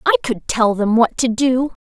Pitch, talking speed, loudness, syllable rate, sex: 255 Hz, 230 wpm, -17 LUFS, 4.5 syllables/s, female